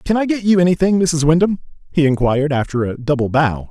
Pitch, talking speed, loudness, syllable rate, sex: 155 Hz, 210 wpm, -16 LUFS, 6.0 syllables/s, male